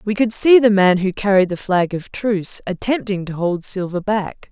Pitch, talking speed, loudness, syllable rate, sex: 200 Hz, 215 wpm, -17 LUFS, 4.8 syllables/s, female